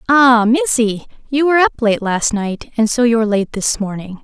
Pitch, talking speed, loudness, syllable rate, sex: 225 Hz, 200 wpm, -15 LUFS, 4.9 syllables/s, female